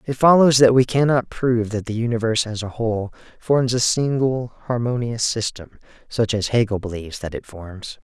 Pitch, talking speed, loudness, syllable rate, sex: 115 Hz, 180 wpm, -20 LUFS, 5.2 syllables/s, male